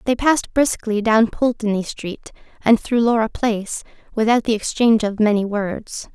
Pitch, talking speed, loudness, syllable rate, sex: 220 Hz, 155 wpm, -19 LUFS, 4.8 syllables/s, female